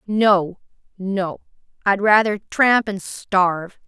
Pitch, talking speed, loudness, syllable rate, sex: 195 Hz, 110 wpm, -19 LUFS, 3.3 syllables/s, female